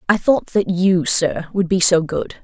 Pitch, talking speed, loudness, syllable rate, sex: 180 Hz, 220 wpm, -17 LUFS, 4.1 syllables/s, female